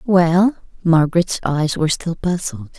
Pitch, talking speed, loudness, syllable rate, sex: 170 Hz, 130 wpm, -18 LUFS, 4.3 syllables/s, female